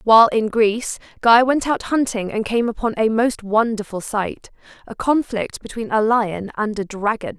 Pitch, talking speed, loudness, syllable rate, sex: 225 Hz, 180 wpm, -19 LUFS, 4.7 syllables/s, female